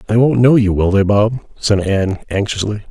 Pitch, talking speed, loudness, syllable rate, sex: 105 Hz, 205 wpm, -15 LUFS, 5.2 syllables/s, male